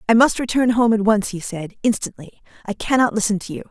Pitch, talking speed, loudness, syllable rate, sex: 215 Hz, 245 wpm, -19 LUFS, 6.0 syllables/s, female